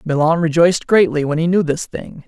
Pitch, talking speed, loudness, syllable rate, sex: 165 Hz, 210 wpm, -15 LUFS, 5.5 syllables/s, male